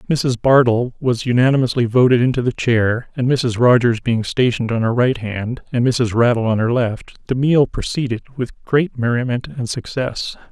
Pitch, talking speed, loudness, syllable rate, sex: 125 Hz, 175 wpm, -17 LUFS, 4.9 syllables/s, male